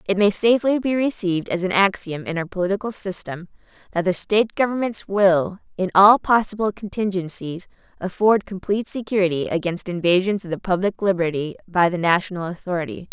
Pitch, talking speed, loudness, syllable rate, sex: 190 Hz, 155 wpm, -21 LUFS, 5.7 syllables/s, female